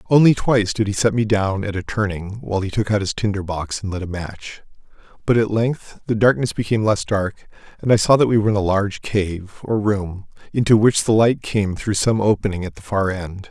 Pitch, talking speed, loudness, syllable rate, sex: 105 Hz, 235 wpm, -19 LUFS, 5.5 syllables/s, male